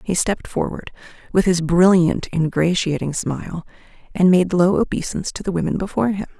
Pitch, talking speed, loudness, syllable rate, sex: 175 Hz, 160 wpm, -19 LUFS, 5.7 syllables/s, female